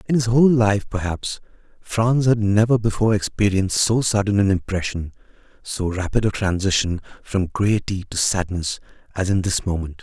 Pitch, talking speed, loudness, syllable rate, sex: 100 Hz, 155 wpm, -20 LUFS, 5.1 syllables/s, male